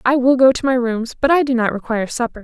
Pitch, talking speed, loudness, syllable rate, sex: 250 Hz, 295 wpm, -16 LUFS, 6.6 syllables/s, female